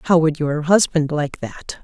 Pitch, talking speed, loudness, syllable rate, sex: 155 Hz, 195 wpm, -18 LUFS, 3.9 syllables/s, female